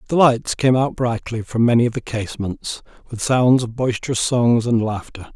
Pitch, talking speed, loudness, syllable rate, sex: 120 Hz, 190 wpm, -19 LUFS, 5.0 syllables/s, male